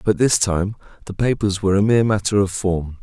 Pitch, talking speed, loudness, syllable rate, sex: 100 Hz, 220 wpm, -19 LUFS, 5.8 syllables/s, male